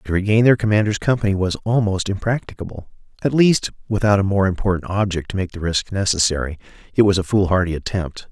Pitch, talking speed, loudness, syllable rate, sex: 100 Hz, 180 wpm, -19 LUFS, 6.1 syllables/s, male